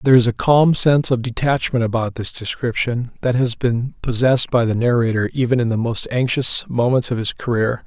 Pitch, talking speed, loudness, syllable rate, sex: 120 Hz, 200 wpm, -18 LUFS, 5.5 syllables/s, male